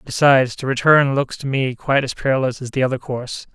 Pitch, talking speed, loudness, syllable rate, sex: 130 Hz, 220 wpm, -18 LUFS, 6.2 syllables/s, male